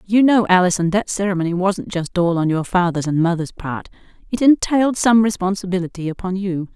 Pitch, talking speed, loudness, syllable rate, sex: 190 Hz, 180 wpm, -18 LUFS, 5.6 syllables/s, female